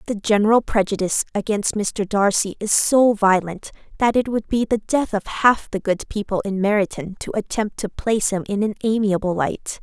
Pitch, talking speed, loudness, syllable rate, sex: 205 Hz, 190 wpm, -20 LUFS, 5.1 syllables/s, female